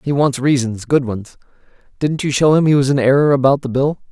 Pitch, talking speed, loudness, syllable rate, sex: 135 Hz, 235 wpm, -15 LUFS, 5.7 syllables/s, male